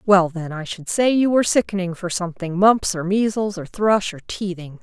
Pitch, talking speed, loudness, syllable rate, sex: 190 Hz, 200 wpm, -20 LUFS, 5.1 syllables/s, female